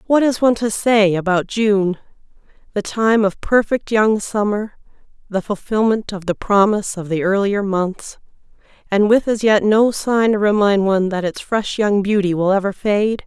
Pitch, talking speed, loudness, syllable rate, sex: 205 Hz, 170 wpm, -17 LUFS, 4.7 syllables/s, female